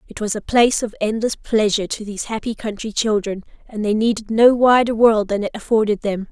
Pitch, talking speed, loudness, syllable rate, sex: 215 Hz, 210 wpm, -18 LUFS, 5.9 syllables/s, female